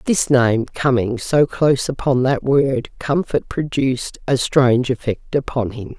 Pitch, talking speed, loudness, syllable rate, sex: 130 Hz, 150 wpm, -18 LUFS, 4.2 syllables/s, female